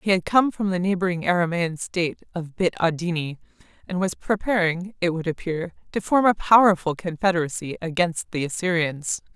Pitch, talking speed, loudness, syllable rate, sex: 175 Hz, 160 wpm, -23 LUFS, 5.3 syllables/s, female